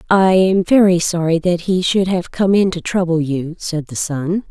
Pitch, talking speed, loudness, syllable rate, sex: 175 Hz, 215 wpm, -16 LUFS, 4.5 syllables/s, female